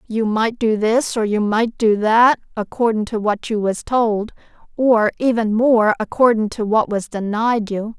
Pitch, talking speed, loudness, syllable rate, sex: 220 Hz, 180 wpm, -18 LUFS, 4.2 syllables/s, female